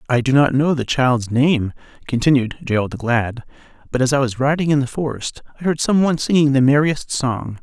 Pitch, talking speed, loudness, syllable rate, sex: 135 Hz, 215 wpm, -18 LUFS, 5.5 syllables/s, male